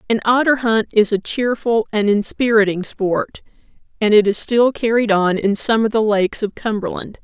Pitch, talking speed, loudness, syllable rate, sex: 215 Hz, 180 wpm, -17 LUFS, 4.9 syllables/s, female